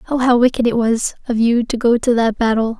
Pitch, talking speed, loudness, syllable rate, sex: 235 Hz, 260 wpm, -16 LUFS, 5.7 syllables/s, female